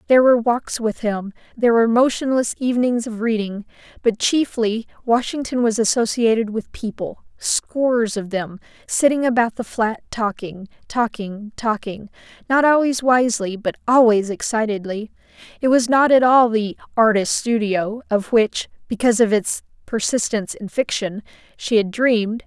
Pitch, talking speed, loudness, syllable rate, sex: 225 Hz, 140 wpm, -19 LUFS, 4.9 syllables/s, female